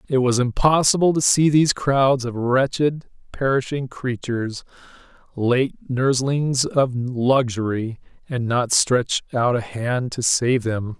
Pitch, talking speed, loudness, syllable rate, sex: 130 Hz, 130 wpm, -20 LUFS, 3.9 syllables/s, male